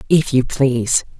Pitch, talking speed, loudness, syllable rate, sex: 130 Hz, 150 wpm, -17 LUFS, 4.6 syllables/s, female